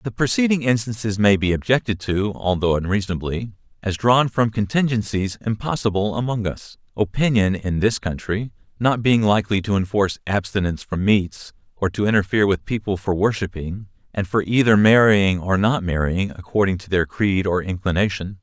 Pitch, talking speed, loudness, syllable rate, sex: 105 Hz, 155 wpm, -20 LUFS, 5.3 syllables/s, male